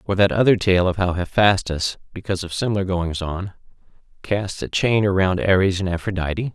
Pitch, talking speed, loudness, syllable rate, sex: 95 Hz, 175 wpm, -20 LUFS, 5.3 syllables/s, male